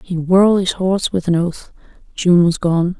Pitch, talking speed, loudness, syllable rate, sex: 180 Hz, 180 wpm, -16 LUFS, 4.8 syllables/s, female